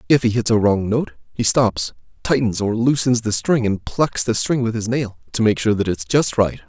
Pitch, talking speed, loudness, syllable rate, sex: 115 Hz, 245 wpm, -19 LUFS, 5.0 syllables/s, male